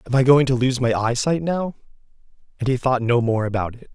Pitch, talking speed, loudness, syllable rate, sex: 125 Hz, 230 wpm, -20 LUFS, 5.7 syllables/s, male